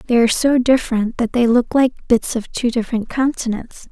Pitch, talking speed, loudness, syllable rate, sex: 240 Hz, 200 wpm, -17 LUFS, 5.4 syllables/s, female